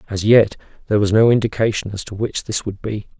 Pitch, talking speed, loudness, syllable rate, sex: 105 Hz, 225 wpm, -18 LUFS, 6.2 syllables/s, male